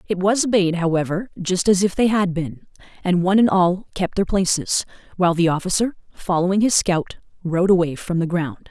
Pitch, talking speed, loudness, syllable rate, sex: 185 Hz, 195 wpm, -19 LUFS, 5.5 syllables/s, female